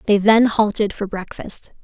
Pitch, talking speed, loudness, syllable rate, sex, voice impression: 205 Hz, 165 wpm, -18 LUFS, 4.4 syllables/s, female, feminine, slightly young, bright, clear, fluent, intellectual, friendly, slightly elegant, slightly strict